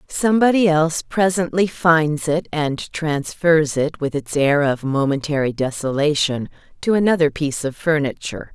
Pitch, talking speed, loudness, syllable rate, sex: 155 Hz, 135 wpm, -19 LUFS, 4.7 syllables/s, female